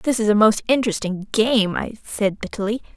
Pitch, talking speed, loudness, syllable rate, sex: 215 Hz, 180 wpm, -20 LUFS, 5.4 syllables/s, female